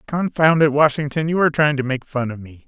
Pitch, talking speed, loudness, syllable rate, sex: 145 Hz, 245 wpm, -18 LUFS, 6.0 syllables/s, male